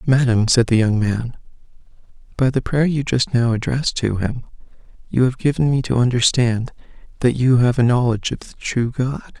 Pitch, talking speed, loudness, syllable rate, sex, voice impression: 125 Hz, 185 wpm, -18 LUFS, 5.2 syllables/s, male, masculine, adult-like, slightly weak, slightly muffled, slightly cool, slightly refreshing, sincere, calm